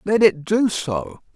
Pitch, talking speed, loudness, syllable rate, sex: 170 Hz, 175 wpm, -20 LUFS, 3.5 syllables/s, male